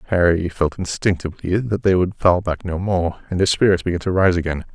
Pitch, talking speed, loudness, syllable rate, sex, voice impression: 90 Hz, 215 wpm, -19 LUFS, 5.8 syllables/s, male, masculine, middle-aged, slightly powerful, slightly dark, hard, clear, slightly raspy, cool, calm, mature, wild, slightly strict, modest